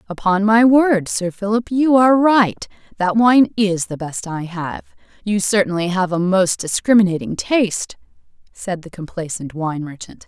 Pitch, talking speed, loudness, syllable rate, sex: 200 Hz, 145 wpm, -17 LUFS, 4.5 syllables/s, female